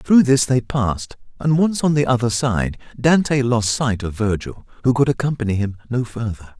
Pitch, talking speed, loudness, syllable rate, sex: 120 Hz, 190 wpm, -19 LUFS, 5.1 syllables/s, male